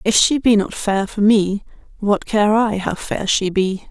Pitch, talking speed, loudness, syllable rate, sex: 205 Hz, 215 wpm, -17 LUFS, 4.1 syllables/s, female